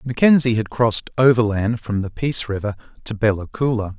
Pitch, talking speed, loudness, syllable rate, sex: 115 Hz, 165 wpm, -19 LUFS, 5.7 syllables/s, male